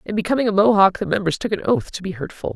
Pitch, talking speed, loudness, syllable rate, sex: 200 Hz, 280 wpm, -19 LUFS, 7.0 syllables/s, female